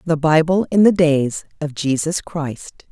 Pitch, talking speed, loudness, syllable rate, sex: 160 Hz, 165 wpm, -18 LUFS, 4.1 syllables/s, female